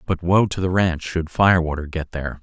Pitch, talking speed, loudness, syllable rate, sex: 85 Hz, 250 wpm, -20 LUFS, 5.2 syllables/s, male